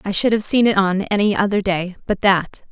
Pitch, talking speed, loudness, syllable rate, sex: 200 Hz, 245 wpm, -18 LUFS, 5.3 syllables/s, female